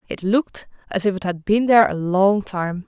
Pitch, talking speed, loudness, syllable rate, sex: 200 Hz, 230 wpm, -19 LUFS, 5.2 syllables/s, female